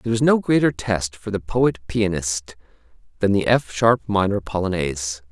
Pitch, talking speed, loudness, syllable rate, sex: 100 Hz, 170 wpm, -21 LUFS, 4.9 syllables/s, male